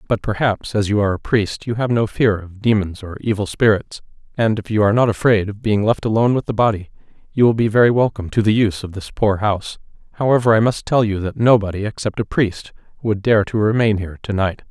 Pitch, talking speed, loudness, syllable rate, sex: 105 Hz, 235 wpm, -18 LUFS, 6.2 syllables/s, male